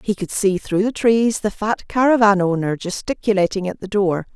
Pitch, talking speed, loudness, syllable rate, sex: 200 Hz, 195 wpm, -19 LUFS, 5.0 syllables/s, female